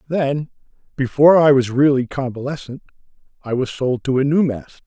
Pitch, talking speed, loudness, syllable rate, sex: 135 Hz, 160 wpm, -17 LUFS, 5.7 syllables/s, male